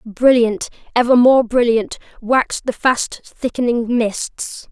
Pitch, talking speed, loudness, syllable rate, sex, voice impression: 240 Hz, 115 wpm, -16 LUFS, 3.7 syllables/s, female, very feminine, very gender-neutral, very young, thin, very tensed, powerful, bright, very hard, very clear, fluent, very cute, intellectual, very refreshing, very sincere, slightly calm, very friendly, reassuring, very unique, elegant, very sweet, lively, strict, sharp